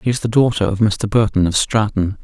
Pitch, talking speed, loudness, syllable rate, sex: 105 Hz, 240 wpm, -16 LUFS, 5.5 syllables/s, male